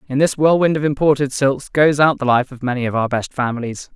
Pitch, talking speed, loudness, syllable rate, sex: 135 Hz, 245 wpm, -17 LUFS, 5.9 syllables/s, male